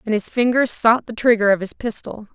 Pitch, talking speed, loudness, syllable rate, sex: 225 Hz, 230 wpm, -18 LUFS, 5.5 syllables/s, female